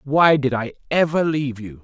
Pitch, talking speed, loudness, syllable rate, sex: 140 Hz, 195 wpm, -19 LUFS, 5.2 syllables/s, male